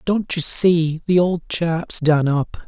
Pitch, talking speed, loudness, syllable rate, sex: 165 Hz, 180 wpm, -18 LUFS, 3.2 syllables/s, male